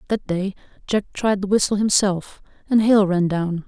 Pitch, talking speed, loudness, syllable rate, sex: 195 Hz, 180 wpm, -20 LUFS, 4.6 syllables/s, female